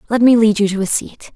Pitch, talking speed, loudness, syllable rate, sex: 215 Hz, 310 wpm, -14 LUFS, 6.1 syllables/s, female